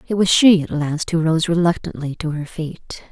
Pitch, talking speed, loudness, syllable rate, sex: 165 Hz, 210 wpm, -18 LUFS, 4.8 syllables/s, female